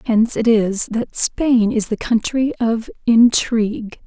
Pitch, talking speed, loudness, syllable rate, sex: 225 Hz, 150 wpm, -17 LUFS, 3.8 syllables/s, female